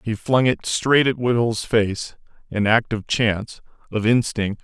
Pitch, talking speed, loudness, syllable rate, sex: 115 Hz, 155 wpm, -20 LUFS, 4.1 syllables/s, male